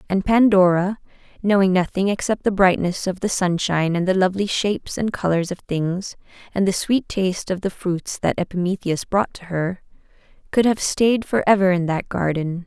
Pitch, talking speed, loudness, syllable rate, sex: 190 Hz, 175 wpm, -20 LUFS, 5.1 syllables/s, female